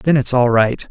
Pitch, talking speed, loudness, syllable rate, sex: 125 Hz, 265 wpm, -15 LUFS, 5.1 syllables/s, male